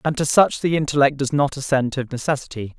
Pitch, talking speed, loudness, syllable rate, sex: 140 Hz, 215 wpm, -20 LUFS, 6.0 syllables/s, male